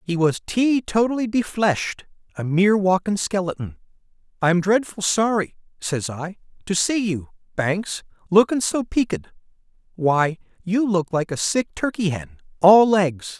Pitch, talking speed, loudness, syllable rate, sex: 195 Hz, 140 wpm, -21 LUFS, 4.5 syllables/s, male